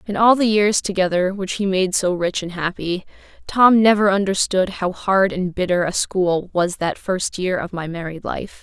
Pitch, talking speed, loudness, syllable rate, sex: 190 Hz, 200 wpm, -19 LUFS, 4.6 syllables/s, female